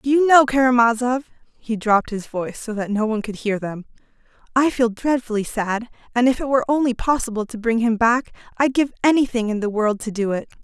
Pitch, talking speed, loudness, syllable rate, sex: 235 Hz, 215 wpm, -20 LUFS, 5.9 syllables/s, female